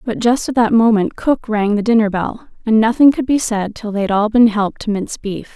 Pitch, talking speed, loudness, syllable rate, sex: 220 Hz, 260 wpm, -15 LUFS, 5.5 syllables/s, female